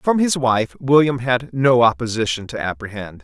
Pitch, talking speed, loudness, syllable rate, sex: 120 Hz, 165 wpm, -18 LUFS, 4.8 syllables/s, male